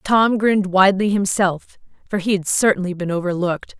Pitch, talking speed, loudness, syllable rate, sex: 190 Hz, 160 wpm, -18 LUFS, 5.5 syllables/s, female